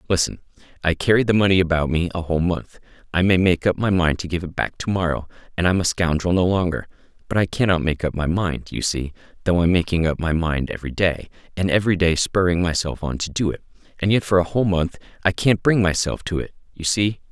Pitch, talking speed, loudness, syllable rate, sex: 90 Hz, 235 wpm, -21 LUFS, 6.1 syllables/s, male